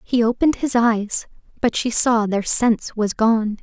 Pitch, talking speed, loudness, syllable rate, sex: 230 Hz, 180 wpm, -19 LUFS, 4.5 syllables/s, female